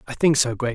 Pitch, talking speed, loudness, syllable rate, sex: 130 Hz, 320 wpm, -20 LUFS, 6.3 syllables/s, male